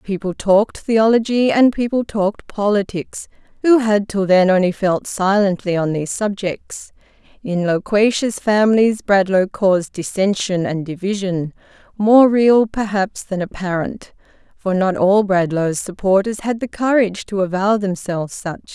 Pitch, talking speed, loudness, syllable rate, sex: 200 Hz, 135 wpm, -17 LUFS, 4.6 syllables/s, female